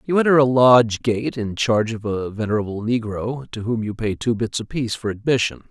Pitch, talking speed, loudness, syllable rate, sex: 115 Hz, 210 wpm, -20 LUFS, 5.6 syllables/s, male